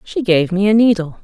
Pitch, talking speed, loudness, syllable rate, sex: 195 Hz, 245 wpm, -14 LUFS, 5.4 syllables/s, female